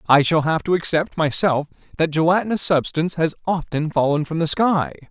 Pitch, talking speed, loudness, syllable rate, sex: 160 Hz, 175 wpm, -20 LUFS, 5.5 syllables/s, male